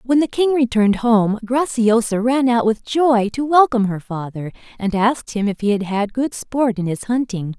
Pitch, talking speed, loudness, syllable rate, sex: 230 Hz, 205 wpm, -18 LUFS, 4.9 syllables/s, female